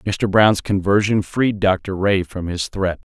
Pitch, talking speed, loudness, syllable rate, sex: 95 Hz, 170 wpm, -18 LUFS, 3.7 syllables/s, male